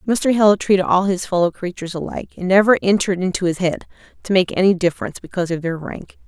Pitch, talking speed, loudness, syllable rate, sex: 185 Hz, 210 wpm, -18 LUFS, 6.8 syllables/s, female